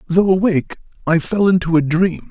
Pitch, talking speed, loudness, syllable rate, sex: 175 Hz, 180 wpm, -16 LUFS, 5.4 syllables/s, male